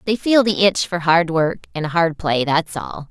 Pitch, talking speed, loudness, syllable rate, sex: 175 Hz, 230 wpm, -18 LUFS, 4.2 syllables/s, female